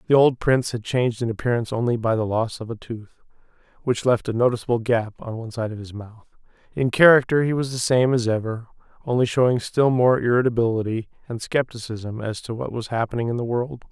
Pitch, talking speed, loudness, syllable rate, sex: 120 Hz, 205 wpm, -22 LUFS, 6.0 syllables/s, male